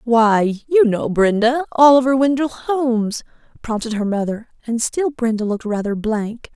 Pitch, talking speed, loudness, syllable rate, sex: 235 Hz, 145 wpm, -18 LUFS, 4.5 syllables/s, female